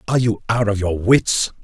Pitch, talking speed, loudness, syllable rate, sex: 105 Hz, 220 wpm, -18 LUFS, 5.2 syllables/s, male